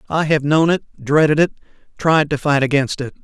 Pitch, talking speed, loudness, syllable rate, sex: 150 Hz, 165 wpm, -17 LUFS, 5.7 syllables/s, male